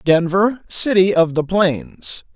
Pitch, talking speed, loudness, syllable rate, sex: 180 Hz, 125 wpm, -17 LUFS, 3.3 syllables/s, male